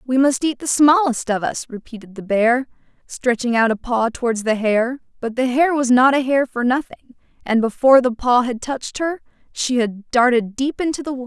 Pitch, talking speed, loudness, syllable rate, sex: 250 Hz, 215 wpm, -18 LUFS, 5.1 syllables/s, female